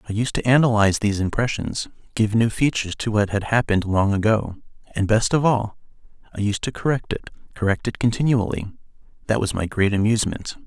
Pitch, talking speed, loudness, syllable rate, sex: 110 Hz, 180 wpm, -21 LUFS, 6.2 syllables/s, male